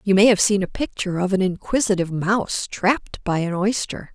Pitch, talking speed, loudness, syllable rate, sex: 195 Hz, 205 wpm, -21 LUFS, 5.7 syllables/s, female